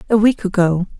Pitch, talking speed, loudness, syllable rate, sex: 200 Hz, 180 wpm, -16 LUFS, 5.8 syllables/s, female